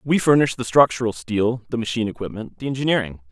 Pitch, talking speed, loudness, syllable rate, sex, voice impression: 115 Hz, 180 wpm, -21 LUFS, 6.4 syllables/s, male, masculine, adult-like, slightly clear, slightly refreshing, slightly sincere, friendly